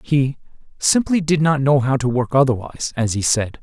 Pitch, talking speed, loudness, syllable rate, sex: 135 Hz, 200 wpm, -18 LUFS, 5.2 syllables/s, male